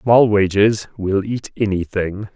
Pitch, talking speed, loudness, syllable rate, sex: 100 Hz, 130 wpm, -18 LUFS, 3.8 syllables/s, male